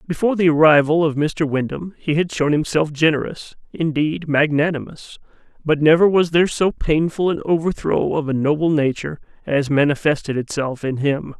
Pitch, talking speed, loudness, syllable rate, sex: 155 Hz, 160 wpm, -18 LUFS, 5.2 syllables/s, male